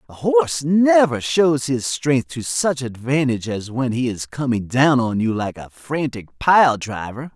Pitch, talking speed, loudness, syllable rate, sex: 135 Hz, 180 wpm, -19 LUFS, 4.2 syllables/s, male